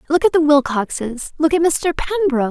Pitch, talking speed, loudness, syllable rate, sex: 300 Hz, 190 wpm, -17 LUFS, 5.2 syllables/s, female